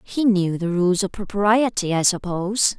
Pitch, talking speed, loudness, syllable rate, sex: 195 Hz, 170 wpm, -20 LUFS, 4.5 syllables/s, female